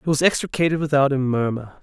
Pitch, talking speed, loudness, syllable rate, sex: 140 Hz, 195 wpm, -20 LUFS, 6.6 syllables/s, male